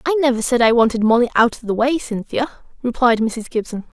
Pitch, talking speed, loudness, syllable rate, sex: 240 Hz, 210 wpm, -18 LUFS, 5.9 syllables/s, female